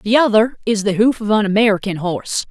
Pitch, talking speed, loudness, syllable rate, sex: 215 Hz, 215 wpm, -16 LUFS, 5.9 syllables/s, female